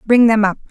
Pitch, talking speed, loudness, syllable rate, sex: 220 Hz, 255 wpm, -13 LUFS, 5.9 syllables/s, female